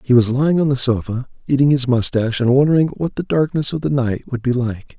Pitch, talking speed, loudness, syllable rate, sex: 130 Hz, 240 wpm, -17 LUFS, 5.9 syllables/s, male